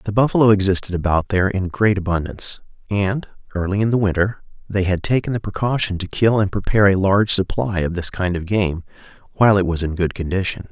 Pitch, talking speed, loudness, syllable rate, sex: 100 Hz, 200 wpm, -19 LUFS, 6.2 syllables/s, male